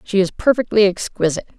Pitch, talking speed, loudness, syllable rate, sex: 195 Hz, 150 wpm, -17 LUFS, 6.5 syllables/s, female